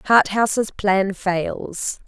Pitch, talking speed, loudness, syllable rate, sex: 200 Hz, 85 wpm, -20 LUFS, 2.6 syllables/s, female